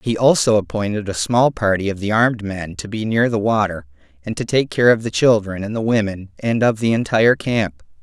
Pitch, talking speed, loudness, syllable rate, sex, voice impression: 105 Hz, 225 wpm, -18 LUFS, 5.5 syllables/s, male, masculine, very adult-like, slightly fluent, calm, reassuring, kind